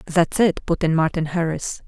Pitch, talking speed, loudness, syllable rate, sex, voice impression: 170 Hz, 190 wpm, -21 LUFS, 4.7 syllables/s, female, very feminine, slightly adult-like, thin, tensed, powerful, bright, soft, very clear, very fluent, very cute, very intellectual, refreshing, sincere, very calm, very friendly, very reassuring, unique, very elegant, slightly wild, very sweet, lively, kind, modest